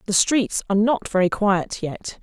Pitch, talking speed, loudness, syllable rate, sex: 200 Hz, 190 wpm, -21 LUFS, 4.6 syllables/s, female